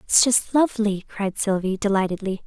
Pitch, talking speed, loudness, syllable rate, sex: 205 Hz, 145 wpm, -21 LUFS, 5.0 syllables/s, female